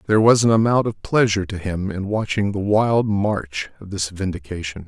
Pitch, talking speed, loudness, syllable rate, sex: 100 Hz, 195 wpm, -20 LUFS, 5.2 syllables/s, male